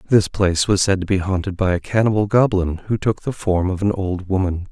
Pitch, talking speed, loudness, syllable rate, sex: 95 Hz, 240 wpm, -19 LUFS, 5.6 syllables/s, male